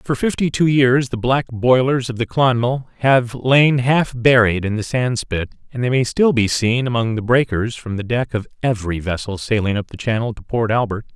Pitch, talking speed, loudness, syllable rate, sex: 120 Hz, 210 wpm, -18 LUFS, 4.9 syllables/s, male